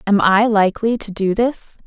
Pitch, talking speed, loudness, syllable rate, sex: 210 Hz, 195 wpm, -16 LUFS, 4.9 syllables/s, female